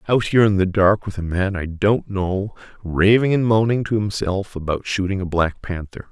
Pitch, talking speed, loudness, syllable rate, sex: 100 Hz, 205 wpm, -20 LUFS, 4.9 syllables/s, male